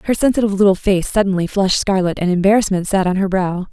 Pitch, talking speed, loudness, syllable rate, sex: 195 Hz, 210 wpm, -16 LUFS, 6.8 syllables/s, female